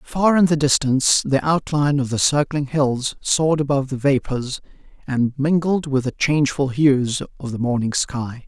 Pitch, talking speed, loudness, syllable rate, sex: 140 Hz, 170 wpm, -19 LUFS, 4.9 syllables/s, male